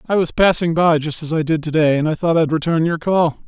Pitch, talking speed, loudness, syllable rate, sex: 160 Hz, 295 wpm, -17 LUFS, 5.8 syllables/s, male